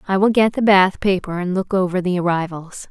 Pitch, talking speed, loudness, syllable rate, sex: 190 Hz, 225 wpm, -18 LUFS, 5.5 syllables/s, female